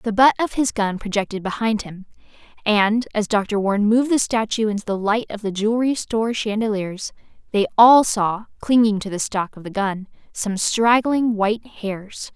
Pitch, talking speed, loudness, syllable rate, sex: 215 Hz, 180 wpm, -20 LUFS, 4.9 syllables/s, female